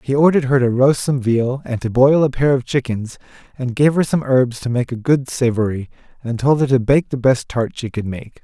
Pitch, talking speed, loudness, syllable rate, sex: 130 Hz, 250 wpm, -17 LUFS, 5.3 syllables/s, male